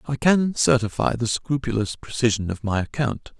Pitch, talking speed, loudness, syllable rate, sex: 120 Hz, 160 wpm, -22 LUFS, 4.9 syllables/s, male